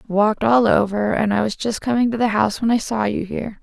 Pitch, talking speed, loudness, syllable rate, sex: 220 Hz, 280 wpm, -19 LUFS, 6.5 syllables/s, female